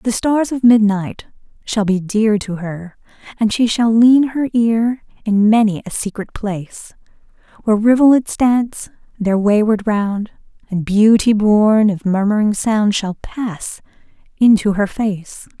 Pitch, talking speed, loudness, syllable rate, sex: 215 Hz, 140 wpm, -15 LUFS, 4.0 syllables/s, female